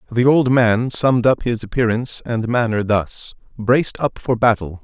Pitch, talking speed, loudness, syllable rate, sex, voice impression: 115 Hz, 175 wpm, -18 LUFS, 4.9 syllables/s, male, masculine, adult-like, fluent, slightly cool, refreshing, slightly unique